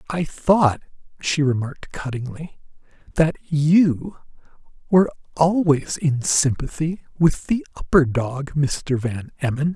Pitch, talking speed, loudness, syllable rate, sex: 150 Hz, 110 wpm, -21 LUFS, 3.9 syllables/s, male